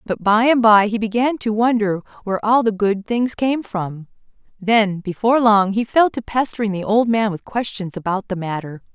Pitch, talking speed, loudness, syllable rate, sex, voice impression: 215 Hz, 200 wpm, -18 LUFS, 5.0 syllables/s, female, feminine, adult-like, slightly clear, slightly intellectual, elegant